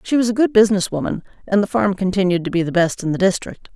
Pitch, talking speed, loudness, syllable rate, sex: 195 Hz, 270 wpm, -18 LUFS, 6.8 syllables/s, female